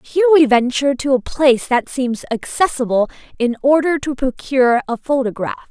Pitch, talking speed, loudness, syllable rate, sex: 265 Hz, 160 wpm, -16 LUFS, 5.3 syllables/s, female